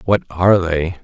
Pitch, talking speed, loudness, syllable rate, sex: 90 Hz, 175 wpm, -16 LUFS, 5.0 syllables/s, male